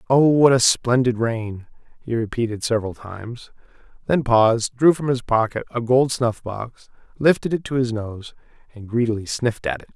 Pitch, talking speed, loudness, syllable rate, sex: 120 Hz, 170 wpm, -20 LUFS, 5.1 syllables/s, male